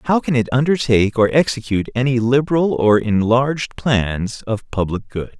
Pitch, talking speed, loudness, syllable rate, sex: 125 Hz, 155 wpm, -17 LUFS, 5.1 syllables/s, male